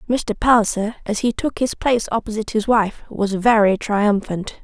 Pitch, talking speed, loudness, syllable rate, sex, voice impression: 220 Hz, 170 wpm, -19 LUFS, 4.9 syllables/s, female, slightly feminine, young, slightly muffled, cute, slightly friendly, slightly kind